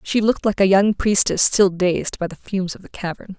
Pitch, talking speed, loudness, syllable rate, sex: 195 Hz, 250 wpm, -19 LUFS, 5.2 syllables/s, female